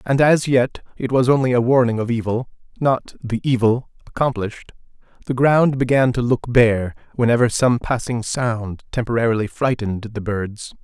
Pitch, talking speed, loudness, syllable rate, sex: 120 Hz, 155 wpm, -19 LUFS, 4.9 syllables/s, male